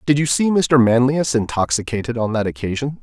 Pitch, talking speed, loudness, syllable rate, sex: 125 Hz, 180 wpm, -18 LUFS, 5.5 syllables/s, male